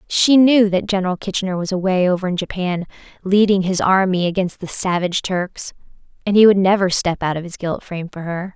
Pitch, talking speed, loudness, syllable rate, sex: 185 Hz, 205 wpm, -18 LUFS, 5.8 syllables/s, female